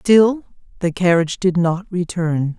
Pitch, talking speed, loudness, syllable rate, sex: 180 Hz, 140 wpm, -18 LUFS, 4.1 syllables/s, female